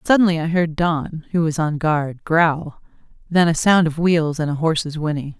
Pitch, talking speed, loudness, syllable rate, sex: 160 Hz, 200 wpm, -19 LUFS, 4.7 syllables/s, female